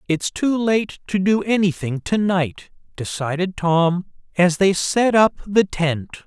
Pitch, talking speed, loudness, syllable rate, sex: 185 Hz, 155 wpm, -19 LUFS, 3.9 syllables/s, male